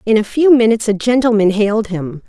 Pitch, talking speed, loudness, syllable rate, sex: 220 Hz, 210 wpm, -14 LUFS, 6.1 syllables/s, female